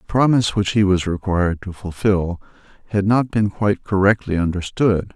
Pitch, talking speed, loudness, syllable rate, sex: 100 Hz, 165 wpm, -19 LUFS, 5.5 syllables/s, male